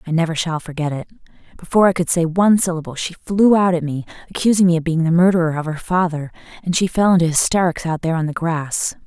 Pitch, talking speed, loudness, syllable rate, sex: 170 Hz, 230 wpm, -18 LUFS, 6.5 syllables/s, female